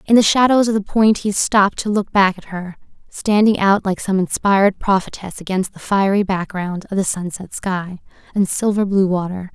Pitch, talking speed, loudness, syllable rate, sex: 195 Hz, 195 wpm, -17 LUFS, 5.0 syllables/s, female